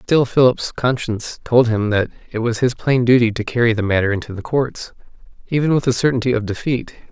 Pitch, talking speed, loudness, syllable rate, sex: 120 Hz, 200 wpm, -18 LUFS, 5.7 syllables/s, male